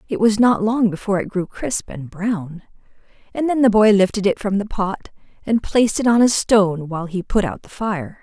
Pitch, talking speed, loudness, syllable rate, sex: 205 Hz, 225 wpm, -18 LUFS, 5.3 syllables/s, female